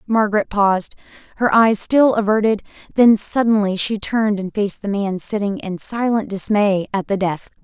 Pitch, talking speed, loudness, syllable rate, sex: 205 Hz, 165 wpm, -18 LUFS, 5.0 syllables/s, female